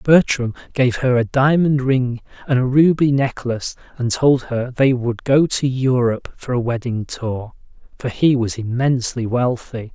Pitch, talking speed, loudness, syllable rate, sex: 125 Hz, 165 wpm, -18 LUFS, 4.4 syllables/s, male